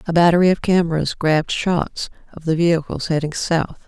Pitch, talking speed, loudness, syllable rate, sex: 165 Hz, 170 wpm, -19 LUFS, 5.4 syllables/s, female